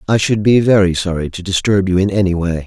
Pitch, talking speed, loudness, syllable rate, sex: 95 Hz, 245 wpm, -14 LUFS, 6.0 syllables/s, male